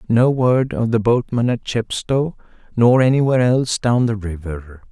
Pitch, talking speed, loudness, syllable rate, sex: 115 Hz, 160 wpm, -17 LUFS, 4.7 syllables/s, male